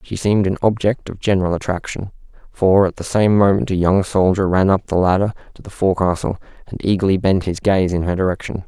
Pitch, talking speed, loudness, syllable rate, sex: 95 Hz, 210 wpm, -17 LUFS, 6.0 syllables/s, male